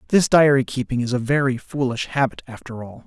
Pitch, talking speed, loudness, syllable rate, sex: 130 Hz, 195 wpm, -20 LUFS, 5.8 syllables/s, male